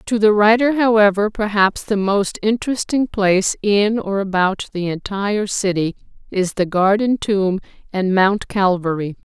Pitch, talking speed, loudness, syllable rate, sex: 200 Hz, 140 wpm, -18 LUFS, 4.5 syllables/s, female